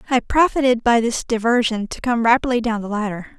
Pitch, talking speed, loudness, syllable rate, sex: 235 Hz, 195 wpm, -19 LUFS, 5.7 syllables/s, female